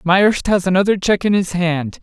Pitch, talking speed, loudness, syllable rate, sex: 185 Hz, 210 wpm, -16 LUFS, 5.2 syllables/s, male